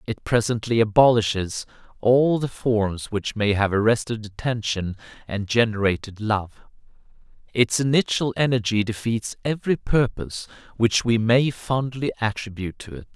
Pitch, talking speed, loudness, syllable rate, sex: 115 Hz, 125 wpm, -22 LUFS, 4.8 syllables/s, male